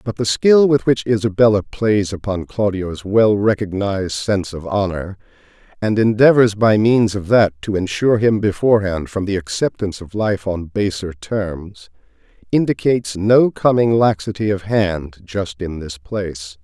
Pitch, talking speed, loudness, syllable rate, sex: 100 Hz, 150 wpm, -17 LUFS, 4.6 syllables/s, male